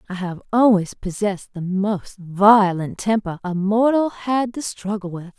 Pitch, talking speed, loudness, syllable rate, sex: 200 Hz, 155 wpm, -20 LUFS, 4.2 syllables/s, female